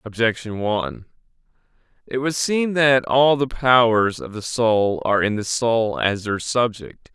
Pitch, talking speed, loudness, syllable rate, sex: 120 Hz, 160 wpm, -20 LUFS, 4.1 syllables/s, male